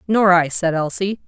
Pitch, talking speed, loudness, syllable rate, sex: 180 Hz, 190 wpm, -17 LUFS, 4.6 syllables/s, female